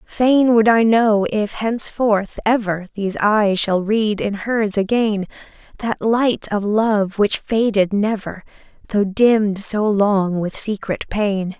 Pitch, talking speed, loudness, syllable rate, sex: 210 Hz, 145 wpm, -18 LUFS, 3.7 syllables/s, female